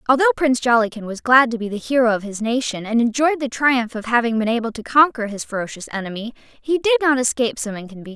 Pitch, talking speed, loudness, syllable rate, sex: 245 Hz, 230 wpm, -19 LUFS, 6.6 syllables/s, female